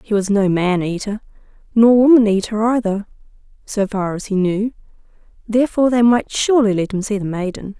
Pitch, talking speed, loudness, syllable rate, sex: 210 Hz, 175 wpm, -17 LUFS, 5.6 syllables/s, female